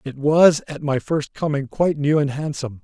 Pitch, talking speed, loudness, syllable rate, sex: 145 Hz, 210 wpm, -20 LUFS, 5.2 syllables/s, male